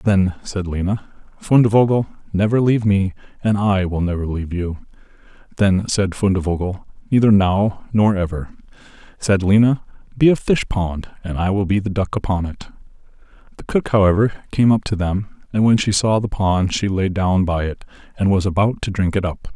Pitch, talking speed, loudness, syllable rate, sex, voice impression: 100 Hz, 180 wpm, -18 LUFS, 5.2 syllables/s, male, very masculine, middle-aged, thick, slightly tensed, very powerful, slightly dark, very soft, very muffled, fluent, raspy, slightly cool, intellectual, slightly refreshing, sincere, calm, very mature, friendly, reassuring, very unique, elegant, wild, sweet, lively, very kind, modest